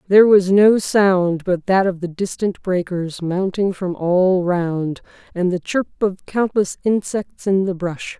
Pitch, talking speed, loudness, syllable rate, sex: 185 Hz, 170 wpm, -18 LUFS, 3.9 syllables/s, female